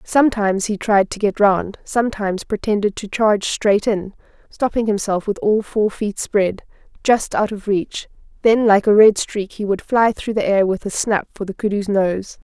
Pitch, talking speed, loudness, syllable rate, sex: 205 Hz, 190 wpm, -18 LUFS, 4.7 syllables/s, female